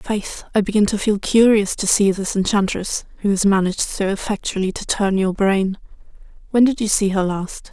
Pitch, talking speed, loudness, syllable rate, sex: 200 Hz, 195 wpm, -19 LUFS, 5.1 syllables/s, female